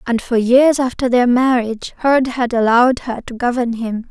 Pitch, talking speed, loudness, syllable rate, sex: 245 Hz, 190 wpm, -15 LUFS, 5.0 syllables/s, female